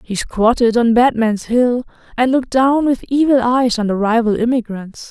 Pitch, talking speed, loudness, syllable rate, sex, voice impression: 240 Hz, 175 wpm, -15 LUFS, 4.7 syllables/s, female, feminine, adult-like, relaxed, slightly powerful, soft, slightly raspy, intellectual, calm, slightly lively, strict, sharp